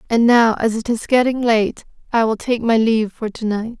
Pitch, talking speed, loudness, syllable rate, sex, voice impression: 225 Hz, 235 wpm, -17 LUFS, 5.2 syllables/s, female, feminine, adult-like, relaxed, powerful, soft, raspy, slightly intellectual, calm, elegant, slightly kind, slightly modest